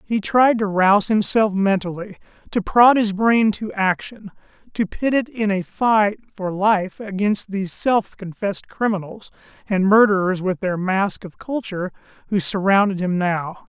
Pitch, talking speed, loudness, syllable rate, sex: 200 Hz, 155 wpm, -19 LUFS, 4.5 syllables/s, male